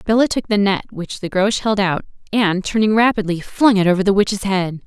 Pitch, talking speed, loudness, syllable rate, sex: 200 Hz, 220 wpm, -17 LUFS, 5.4 syllables/s, female